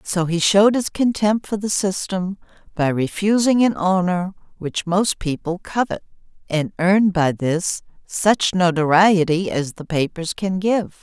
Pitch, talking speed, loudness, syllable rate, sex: 185 Hz, 145 wpm, -19 LUFS, 4.2 syllables/s, female